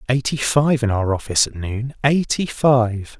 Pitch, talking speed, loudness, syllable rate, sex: 125 Hz, 150 wpm, -19 LUFS, 4.4 syllables/s, male